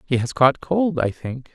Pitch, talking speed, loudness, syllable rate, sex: 140 Hz, 235 wpm, -20 LUFS, 4.2 syllables/s, male